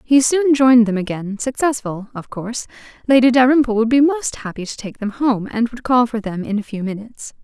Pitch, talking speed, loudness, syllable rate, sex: 235 Hz, 220 wpm, -17 LUFS, 5.6 syllables/s, female